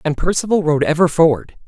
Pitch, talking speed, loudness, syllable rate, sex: 160 Hz, 180 wpm, -16 LUFS, 6.0 syllables/s, male